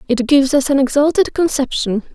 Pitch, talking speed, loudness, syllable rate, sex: 275 Hz, 170 wpm, -15 LUFS, 5.8 syllables/s, female